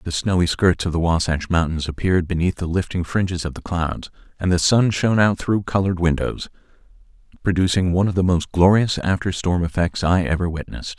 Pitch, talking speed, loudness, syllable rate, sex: 90 Hz, 190 wpm, -20 LUFS, 5.8 syllables/s, male